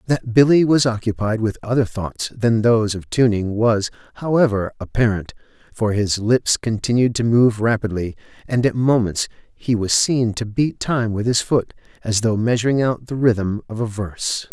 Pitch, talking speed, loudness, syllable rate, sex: 115 Hz, 175 wpm, -19 LUFS, 4.8 syllables/s, male